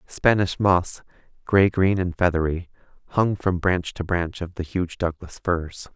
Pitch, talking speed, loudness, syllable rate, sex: 90 Hz, 160 wpm, -23 LUFS, 4.1 syllables/s, male